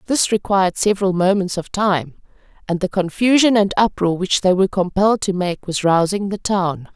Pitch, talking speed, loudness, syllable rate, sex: 190 Hz, 180 wpm, -18 LUFS, 5.3 syllables/s, female